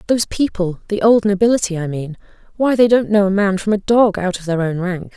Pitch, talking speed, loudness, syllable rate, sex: 200 Hz, 220 wpm, -16 LUFS, 5.8 syllables/s, female